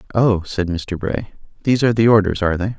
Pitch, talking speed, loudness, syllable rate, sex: 100 Hz, 215 wpm, -18 LUFS, 6.6 syllables/s, male